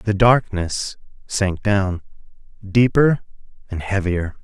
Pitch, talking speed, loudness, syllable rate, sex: 100 Hz, 95 wpm, -19 LUFS, 3.3 syllables/s, male